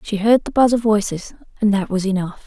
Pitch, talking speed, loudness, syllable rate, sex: 205 Hz, 245 wpm, -18 LUFS, 5.6 syllables/s, female